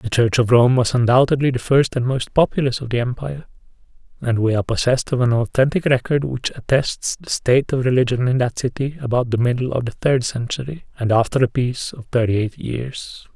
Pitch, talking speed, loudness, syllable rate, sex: 125 Hz, 205 wpm, -19 LUFS, 5.8 syllables/s, male